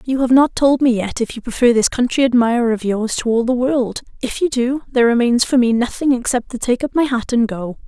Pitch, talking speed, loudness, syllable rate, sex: 245 Hz, 260 wpm, -17 LUFS, 5.7 syllables/s, female